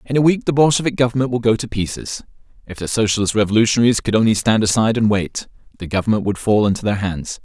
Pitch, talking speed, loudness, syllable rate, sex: 110 Hz, 220 wpm, -17 LUFS, 6.8 syllables/s, male